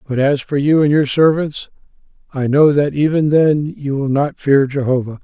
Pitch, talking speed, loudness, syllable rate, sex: 145 Hz, 195 wpm, -15 LUFS, 4.7 syllables/s, male